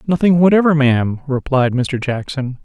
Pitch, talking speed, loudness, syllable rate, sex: 140 Hz, 135 wpm, -15 LUFS, 4.9 syllables/s, male